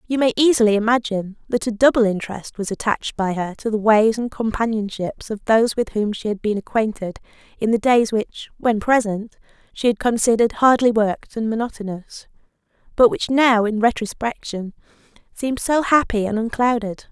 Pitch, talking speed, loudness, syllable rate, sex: 220 Hz, 170 wpm, -19 LUFS, 5.5 syllables/s, female